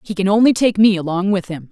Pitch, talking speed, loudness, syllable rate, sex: 195 Hz, 280 wpm, -15 LUFS, 6.2 syllables/s, female